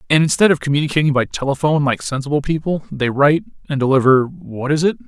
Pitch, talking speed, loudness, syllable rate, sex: 145 Hz, 180 wpm, -17 LUFS, 6.7 syllables/s, male